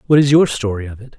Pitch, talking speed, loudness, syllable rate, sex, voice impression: 125 Hz, 305 wpm, -15 LUFS, 6.9 syllables/s, male, masculine, adult-like, slightly tensed, slightly powerful, hard, slightly muffled, cool, intellectual, calm, wild, lively, kind